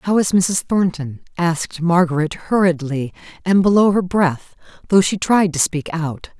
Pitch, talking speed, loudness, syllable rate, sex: 175 Hz, 160 wpm, -17 LUFS, 4.4 syllables/s, female